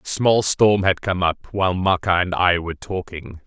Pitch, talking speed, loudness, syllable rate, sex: 90 Hz, 210 wpm, -19 LUFS, 4.8 syllables/s, male